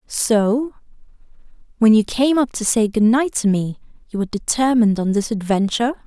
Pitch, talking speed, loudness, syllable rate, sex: 225 Hz, 150 wpm, -18 LUFS, 5.2 syllables/s, female